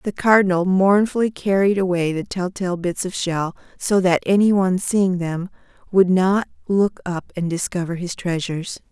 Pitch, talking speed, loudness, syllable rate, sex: 185 Hz, 170 wpm, -20 LUFS, 4.7 syllables/s, female